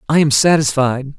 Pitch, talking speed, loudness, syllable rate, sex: 145 Hz, 150 wpm, -14 LUFS, 5.1 syllables/s, male